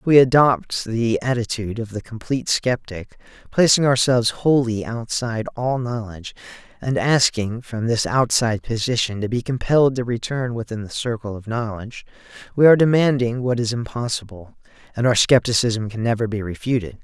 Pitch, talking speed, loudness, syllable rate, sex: 115 Hz, 155 wpm, -20 LUFS, 5.4 syllables/s, male